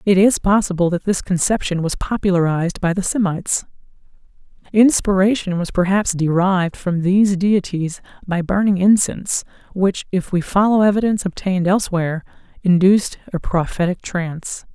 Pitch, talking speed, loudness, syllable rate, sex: 185 Hz, 130 wpm, -18 LUFS, 5.4 syllables/s, female